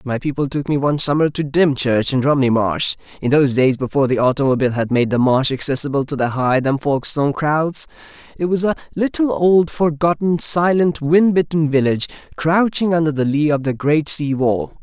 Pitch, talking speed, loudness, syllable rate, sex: 145 Hz, 190 wpm, -17 LUFS, 5.6 syllables/s, male